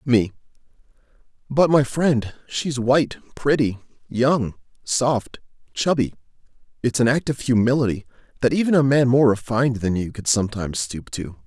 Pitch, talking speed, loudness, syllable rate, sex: 125 Hz, 135 wpm, -21 LUFS, 4.8 syllables/s, male